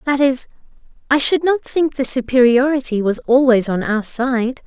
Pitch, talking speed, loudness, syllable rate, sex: 260 Hz, 155 wpm, -16 LUFS, 4.6 syllables/s, female